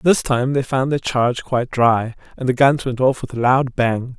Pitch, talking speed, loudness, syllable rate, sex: 130 Hz, 245 wpm, -18 LUFS, 4.9 syllables/s, male